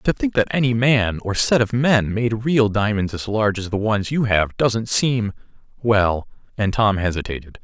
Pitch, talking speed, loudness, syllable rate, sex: 110 Hz, 190 wpm, -20 LUFS, 4.6 syllables/s, male